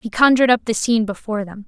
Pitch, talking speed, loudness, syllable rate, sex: 220 Hz, 250 wpm, -17 LUFS, 7.4 syllables/s, female